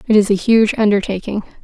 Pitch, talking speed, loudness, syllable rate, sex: 210 Hz, 185 wpm, -15 LUFS, 6.1 syllables/s, female